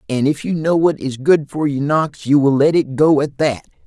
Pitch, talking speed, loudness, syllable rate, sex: 145 Hz, 265 wpm, -16 LUFS, 4.8 syllables/s, male